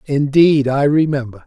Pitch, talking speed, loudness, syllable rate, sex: 140 Hz, 125 wpm, -15 LUFS, 4.5 syllables/s, male